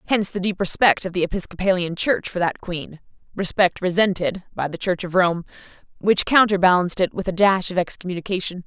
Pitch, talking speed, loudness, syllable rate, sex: 185 Hz, 175 wpm, -21 LUFS, 5.8 syllables/s, female